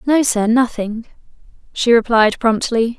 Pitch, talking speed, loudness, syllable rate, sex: 230 Hz, 120 wpm, -16 LUFS, 4.1 syllables/s, female